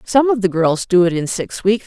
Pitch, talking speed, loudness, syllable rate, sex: 195 Hz, 290 wpm, -16 LUFS, 5.1 syllables/s, female